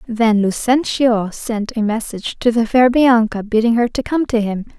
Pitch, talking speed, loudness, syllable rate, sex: 230 Hz, 190 wpm, -16 LUFS, 4.7 syllables/s, female